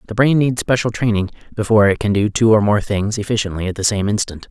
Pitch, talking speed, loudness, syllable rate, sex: 105 Hz, 240 wpm, -17 LUFS, 6.3 syllables/s, male